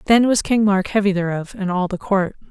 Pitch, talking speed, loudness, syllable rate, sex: 195 Hz, 240 wpm, -19 LUFS, 5.5 syllables/s, female